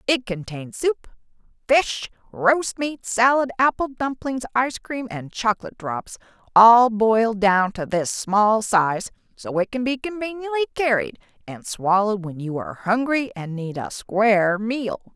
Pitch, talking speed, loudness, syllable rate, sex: 225 Hz, 150 wpm, -21 LUFS, 4.3 syllables/s, female